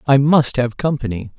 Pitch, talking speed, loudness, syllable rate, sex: 130 Hz, 175 wpm, -17 LUFS, 5.0 syllables/s, male